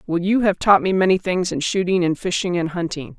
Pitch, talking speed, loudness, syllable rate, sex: 180 Hz, 245 wpm, -19 LUFS, 5.6 syllables/s, female